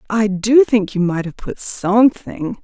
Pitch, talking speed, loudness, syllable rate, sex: 210 Hz, 180 wpm, -16 LUFS, 4.2 syllables/s, female